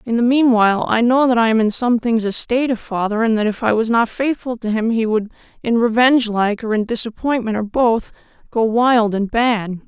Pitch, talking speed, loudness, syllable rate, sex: 230 Hz, 220 wpm, -17 LUFS, 5.3 syllables/s, female